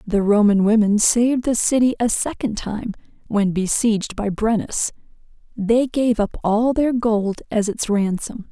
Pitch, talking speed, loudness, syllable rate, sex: 220 Hz, 155 wpm, -19 LUFS, 4.3 syllables/s, female